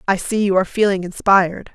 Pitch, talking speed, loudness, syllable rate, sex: 190 Hz, 205 wpm, -17 LUFS, 6.4 syllables/s, female